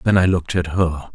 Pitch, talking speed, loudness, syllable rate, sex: 85 Hz, 260 wpm, -19 LUFS, 5.9 syllables/s, male